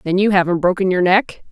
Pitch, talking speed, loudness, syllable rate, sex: 185 Hz, 240 wpm, -16 LUFS, 5.8 syllables/s, female